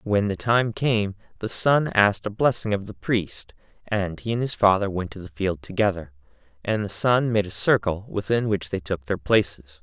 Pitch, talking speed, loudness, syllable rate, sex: 100 Hz, 210 wpm, -23 LUFS, 4.9 syllables/s, male